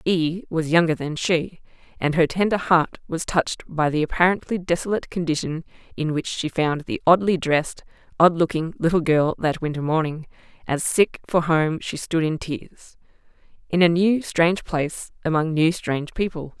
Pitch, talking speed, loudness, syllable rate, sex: 165 Hz, 170 wpm, -22 LUFS, 5.0 syllables/s, female